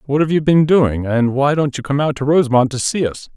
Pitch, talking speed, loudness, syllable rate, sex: 140 Hz, 285 wpm, -16 LUFS, 5.7 syllables/s, male